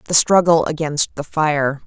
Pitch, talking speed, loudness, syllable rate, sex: 155 Hz, 160 wpm, -17 LUFS, 4.2 syllables/s, female